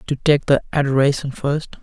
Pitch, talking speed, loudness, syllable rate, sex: 140 Hz, 165 wpm, -18 LUFS, 5.0 syllables/s, male